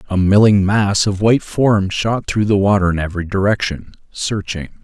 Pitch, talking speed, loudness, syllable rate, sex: 100 Hz, 175 wpm, -16 LUFS, 5.1 syllables/s, male